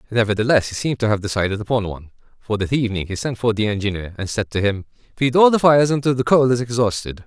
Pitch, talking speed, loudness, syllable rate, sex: 115 Hz, 240 wpm, -19 LUFS, 7.0 syllables/s, male